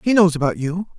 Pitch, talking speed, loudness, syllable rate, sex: 175 Hz, 245 wpm, -19 LUFS, 6.1 syllables/s, male